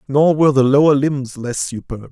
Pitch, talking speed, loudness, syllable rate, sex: 140 Hz, 200 wpm, -16 LUFS, 5.1 syllables/s, male